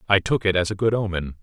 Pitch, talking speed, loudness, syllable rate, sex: 95 Hz, 295 wpm, -22 LUFS, 6.6 syllables/s, male